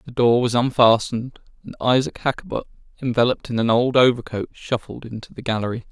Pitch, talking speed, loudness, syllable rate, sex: 120 Hz, 160 wpm, -20 LUFS, 6.1 syllables/s, male